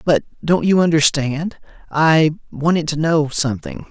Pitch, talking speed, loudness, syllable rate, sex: 155 Hz, 90 wpm, -17 LUFS, 4.5 syllables/s, male